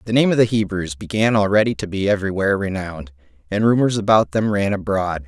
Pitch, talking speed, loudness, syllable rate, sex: 100 Hz, 205 wpm, -19 LUFS, 6.3 syllables/s, male